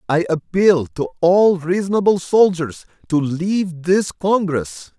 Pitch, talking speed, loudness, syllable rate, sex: 170 Hz, 120 wpm, -17 LUFS, 3.9 syllables/s, male